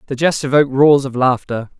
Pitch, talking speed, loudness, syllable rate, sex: 135 Hz, 200 wpm, -15 LUFS, 5.8 syllables/s, male